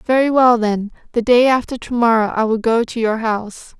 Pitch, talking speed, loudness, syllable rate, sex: 230 Hz, 220 wpm, -16 LUFS, 5.3 syllables/s, female